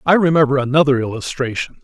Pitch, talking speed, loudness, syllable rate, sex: 140 Hz, 130 wpm, -16 LUFS, 6.6 syllables/s, male